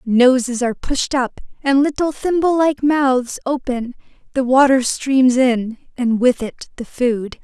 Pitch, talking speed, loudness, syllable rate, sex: 260 Hz, 155 wpm, -17 LUFS, 3.9 syllables/s, female